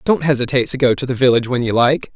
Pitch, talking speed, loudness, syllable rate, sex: 130 Hz, 280 wpm, -16 LUFS, 7.3 syllables/s, male